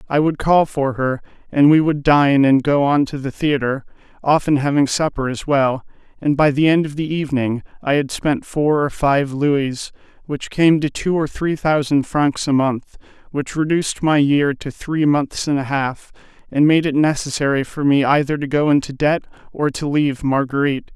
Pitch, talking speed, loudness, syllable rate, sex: 145 Hz, 200 wpm, -18 LUFS, 4.8 syllables/s, male